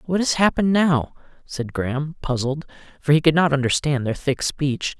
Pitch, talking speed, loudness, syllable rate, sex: 150 Hz, 180 wpm, -21 LUFS, 5.1 syllables/s, male